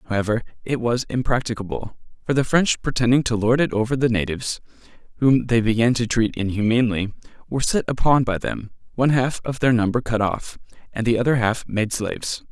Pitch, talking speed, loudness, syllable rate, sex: 120 Hz, 180 wpm, -21 LUFS, 5.8 syllables/s, male